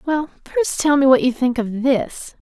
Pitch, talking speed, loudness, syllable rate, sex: 270 Hz, 220 wpm, -18 LUFS, 4.5 syllables/s, female